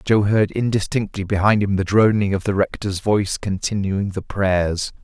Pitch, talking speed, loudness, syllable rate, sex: 100 Hz, 165 wpm, -20 LUFS, 4.7 syllables/s, male